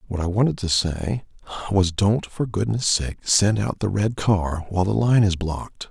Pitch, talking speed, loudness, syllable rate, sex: 100 Hz, 205 wpm, -22 LUFS, 4.6 syllables/s, male